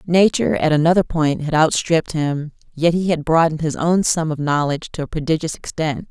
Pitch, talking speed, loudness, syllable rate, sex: 160 Hz, 195 wpm, -18 LUFS, 5.8 syllables/s, female